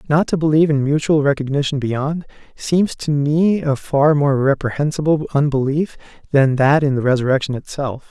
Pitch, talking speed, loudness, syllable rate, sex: 145 Hz, 155 wpm, -17 LUFS, 5.2 syllables/s, male